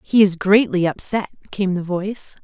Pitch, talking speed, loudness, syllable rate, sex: 190 Hz, 150 wpm, -19 LUFS, 4.4 syllables/s, female